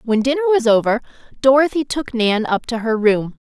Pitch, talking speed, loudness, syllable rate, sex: 245 Hz, 190 wpm, -17 LUFS, 5.3 syllables/s, female